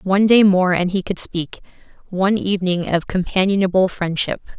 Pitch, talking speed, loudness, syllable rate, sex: 185 Hz, 145 wpm, -18 LUFS, 5.4 syllables/s, female